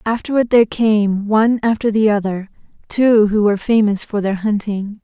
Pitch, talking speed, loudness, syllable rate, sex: 215 Hz, 165 wpm, -16 LUFS, 5.1 syllables/s, female